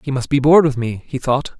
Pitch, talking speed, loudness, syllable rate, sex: 135 Hz, 300 wpm, -16 LUFS, 6.4 syllables/s, male